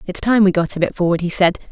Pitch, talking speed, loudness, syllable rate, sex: 185 Hz, 315 wpm, -17 LUFS, 6.8 syllables/s, female